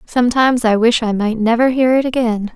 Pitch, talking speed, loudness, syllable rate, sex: 235 Hz, 210 wpm, -15 LUFS, 5.7 syllables/s, female